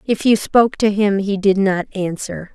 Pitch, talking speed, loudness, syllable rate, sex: 200 Hz, 210 wpm, -17 LUFS, 4.5 syllables/s, female